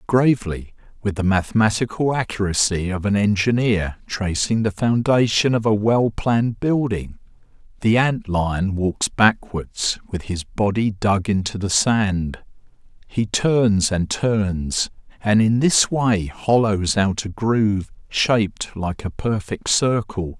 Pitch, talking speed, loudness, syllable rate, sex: 105 Hz, 130 wpm, -20 LUFS, 3.8 syllables/s, male